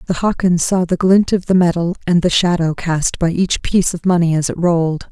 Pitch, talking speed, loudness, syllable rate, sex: 175 Hz, 235 wpm, -15 LUFS, 5.4 syllables/s, female